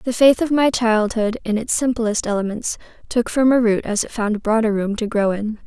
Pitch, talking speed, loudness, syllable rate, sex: 225 Hz, 210 wpm, -19 LUFS, 5.0 syllables/s, female